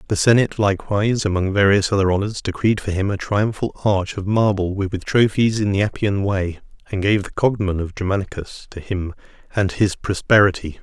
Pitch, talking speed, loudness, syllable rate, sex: 100 Hz, 175 wpm, -19 LUFS, 5.5 syllables/s, male